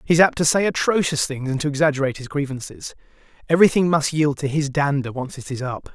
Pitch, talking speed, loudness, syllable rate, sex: 145 Hz, 220 wpm, -20 LUFS, 6.4 syllables/s, male